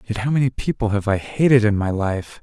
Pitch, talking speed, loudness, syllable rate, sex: 110 Hz, 245 wpm, -19 LUFS, 5.6 syllables/s, male